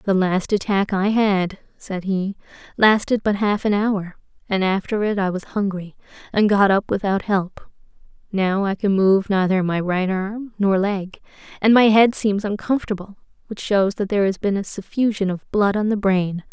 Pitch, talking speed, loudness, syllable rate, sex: 200 Hz, 185 wpm, -20 LUFS, 4.7 syllables/s, female